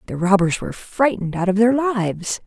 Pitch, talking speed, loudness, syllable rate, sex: 205 Hz, 195 wpm, -19 LUFS, 5.8 syllables/s, female